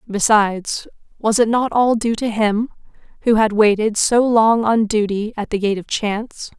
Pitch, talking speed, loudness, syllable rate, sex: 220 Hz, 180 wpm, -17 LUFS, 4.6 syllables/s, female